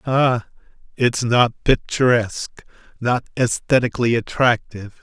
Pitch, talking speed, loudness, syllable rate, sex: 120 Hz, 85 wpm, -19 LUFS, 4.4 syllables/s, male